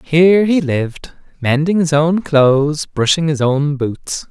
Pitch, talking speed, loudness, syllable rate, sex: 150 Hz, 155 wpm, -15 LUFS, 4.1 syllables/s, male